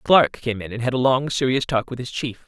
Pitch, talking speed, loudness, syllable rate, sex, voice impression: 125 Hz, 290 wpm, -21 LUFS, 5.5 syllables/s, male, masculine, adult-like, tensed, powerful, bright, clear, fluent, cool, intellectual, friendly, wild, lively, sharp